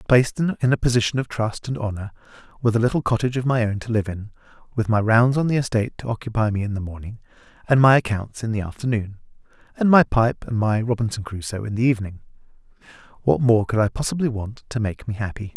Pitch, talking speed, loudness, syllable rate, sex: 115 Hz, 210 wpm, -21 LUFS, 6.4 syllables/s, male